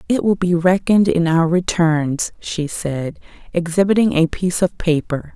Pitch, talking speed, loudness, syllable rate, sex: 175 Hz, 155 wpm, -18 LUFS, 4.6 syllables/s, female